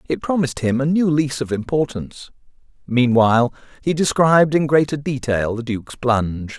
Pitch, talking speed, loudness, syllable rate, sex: 135 Hz, 155 wpm, -19 LUFS, 5.5 syllables/s, male